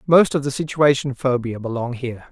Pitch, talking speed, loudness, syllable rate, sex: 130 Hz, 180 wpm, -20 LUFS, 5.5 syllables/s, male